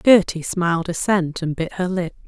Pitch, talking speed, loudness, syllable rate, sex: 175 Hz, 185 wpm, -21 LUFS, 4.8 syllables/s, female